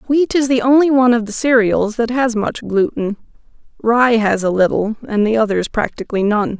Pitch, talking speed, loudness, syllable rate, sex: 230 Hz, 190 wpm, -16 LUFS, 5.1 syllables/s, female